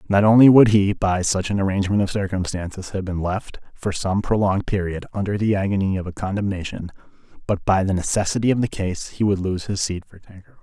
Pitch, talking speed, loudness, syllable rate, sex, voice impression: 100 Hz, 210 wpm, -21 LUFS, 6.2 syllables/s, male, masculine, adult-like, slightly thick, fluent, cool, intellectual, calm, slightly reassuring